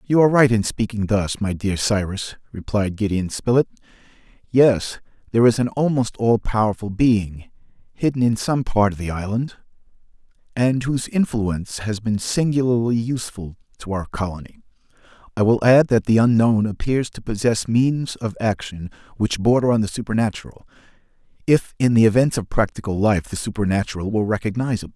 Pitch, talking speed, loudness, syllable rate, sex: 110 Hz, 155 wpm, -20 LUFS, 5.4 syllables/s, male